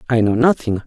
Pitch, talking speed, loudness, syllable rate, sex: 120 Hz, 205 wpm, -16 LUFS, 5.9 syllables/s, male